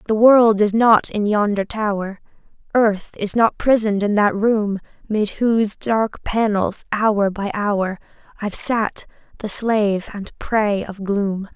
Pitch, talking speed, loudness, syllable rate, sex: 210 Hz, 150 wpm, -18 LUFS, 3.9 syllables/s, female